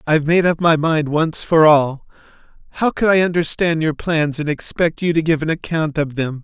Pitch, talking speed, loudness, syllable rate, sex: 160 Hz, 215 wpm, -17 LUFS, 5.0 syllables/s, male